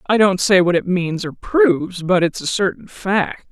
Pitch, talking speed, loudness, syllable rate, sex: 190 Hz, 220 wpm, -17 LUFS, 4.5 syllables/s, female